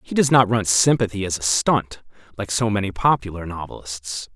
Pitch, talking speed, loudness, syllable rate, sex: 100 Hz, 180 wpm, -20 LUFS, 5.1 syllables/s, male